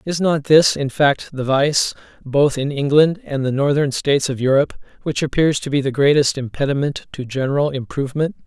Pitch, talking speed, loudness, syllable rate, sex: 140 Hz, 185 wpm, -18 LUFS, 5.4 syllables/s, male